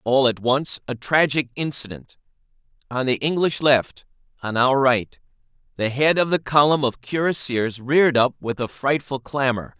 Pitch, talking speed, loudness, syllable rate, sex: 135 Hz, 160 wpm, -21 LUFS, 4.6 syllables/s, male